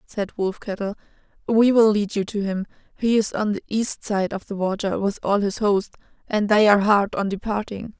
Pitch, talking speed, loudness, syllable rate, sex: 205 Hz, 205 wpm, -22 LUFS, 5.1 syllables/s, female